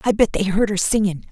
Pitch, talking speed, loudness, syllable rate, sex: 200 Hz, 275 wpm, -19 LUFS, 5.9 syllables/s, female